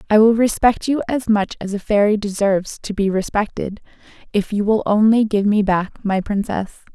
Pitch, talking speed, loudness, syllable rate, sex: 210 Hz, 190 wpm, -18 LUFS, 5.2 syllables/s, female